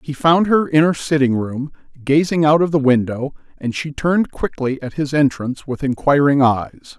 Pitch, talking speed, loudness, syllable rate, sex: 145 Hz, 190 wpm, -17 LUFS, 4.9 syllables/s, male